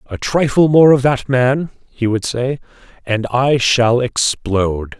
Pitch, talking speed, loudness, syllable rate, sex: 125 Hz, 155 wpm, -15 LUFS, 3.8 syllables/s, male